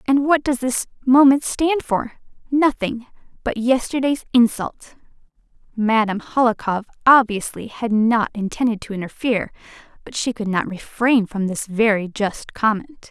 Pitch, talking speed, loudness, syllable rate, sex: 235 Hz, 135 wpm, -19 LUFS, 4.6 syllables/s, female